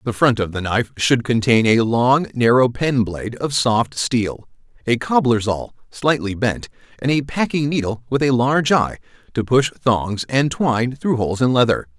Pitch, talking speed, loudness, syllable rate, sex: 120 Hz, 185 wpm, -18 LUFS, 4.7 syllables/s, male